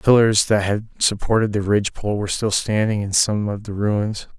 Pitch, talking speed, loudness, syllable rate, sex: 105 Hz, 205 wpm, -20 LUFS, 5.4 syllables/s, male